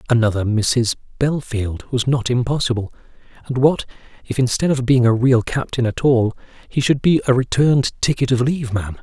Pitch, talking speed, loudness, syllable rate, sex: 125 Hz, 175 wpm, -18 LUFS, 5.3 syllables/s, male